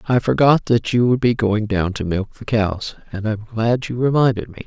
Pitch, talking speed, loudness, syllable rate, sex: 115 Hz, 230 wpm, -19 LUFS, 5.0 syllables/s, female